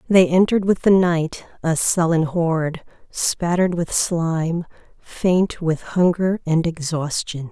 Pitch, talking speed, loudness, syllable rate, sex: 170 Hz, 130 wpm, -19 LUFS, 4.0 syllables/s, female